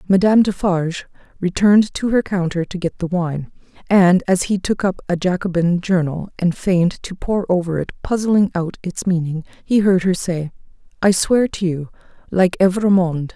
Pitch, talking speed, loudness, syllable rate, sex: 185 Hz, 170 wpm, -18 LUFS, 5.0 syllables/s, female